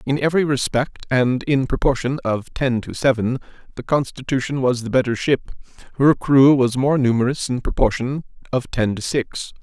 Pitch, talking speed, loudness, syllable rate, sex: 130 Hz, 170 wpm, -20 LUFS, 5.0 syllables/s, male